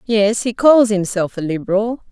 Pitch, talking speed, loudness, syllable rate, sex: 210 Hz, 170 wpm, -16 LUFS, 4.6 syllables/s, female